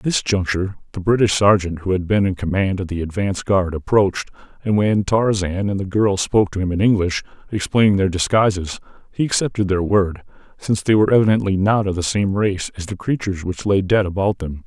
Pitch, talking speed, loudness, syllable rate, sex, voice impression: 95 Hz, 210 wpm, -19 LUFS, 5.9 syllables/s, male, masculine, middle-aged, thick, tensed, slightly hard, slightly muffled, cool, intellectual, mature, wild, slightly strict